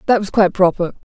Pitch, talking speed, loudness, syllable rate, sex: 190 Hz, 205 wpm, -16 LUFS, 7.6 syllables/s, female